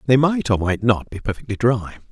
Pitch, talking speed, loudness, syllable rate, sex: 115 Hz, 225 wpm, -20 LUFS, 5.4 syllables/s, male